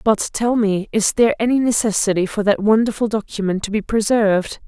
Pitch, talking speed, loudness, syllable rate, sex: 215 Hz, 180 wpm, -18 LUFS, 5.6 syllables/s, female